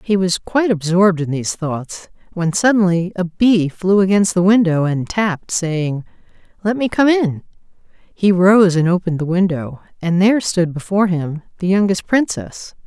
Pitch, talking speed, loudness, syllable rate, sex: 185 Hz, 170 wpm, -16 LUFS, 4.9 syllables/s, female